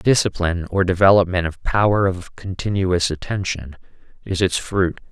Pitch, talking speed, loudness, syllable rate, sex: 90 Hz, 130 wpm, -19 LUFS, 4.8 syllables/s, male